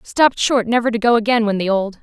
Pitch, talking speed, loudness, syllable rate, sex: 225 Hz, 265 wpm, -16 LUFS, 6.3 syllables/s, female